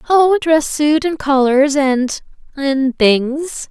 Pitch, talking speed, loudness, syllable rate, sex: 285 Hz, 130 wpm, -15 LUFS, 3.1 syllables/s, female